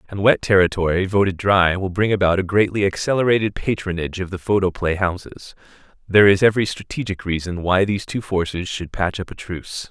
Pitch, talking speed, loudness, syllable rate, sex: 95 Hz, 180 wpm, -19 LUFS, 6.0 syllables/s, male